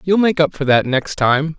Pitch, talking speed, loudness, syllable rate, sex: 155 Hz, 265 wpm, -16 LUFS, 4.7 syllables/s, male